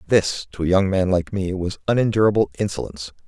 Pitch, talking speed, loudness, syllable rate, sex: 95 Hz, 185 wpm, -21 LUFS, 5.2 syllables/s, male